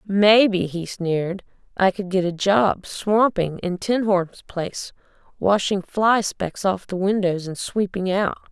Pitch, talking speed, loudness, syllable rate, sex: 190 Hz, 140 wpm, -21 LUFS, 3.9 syllables/s, female